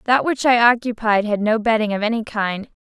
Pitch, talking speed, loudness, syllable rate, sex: 220 Hz, 210 wpm, -18 LUFS, 5.4 syllables/s, female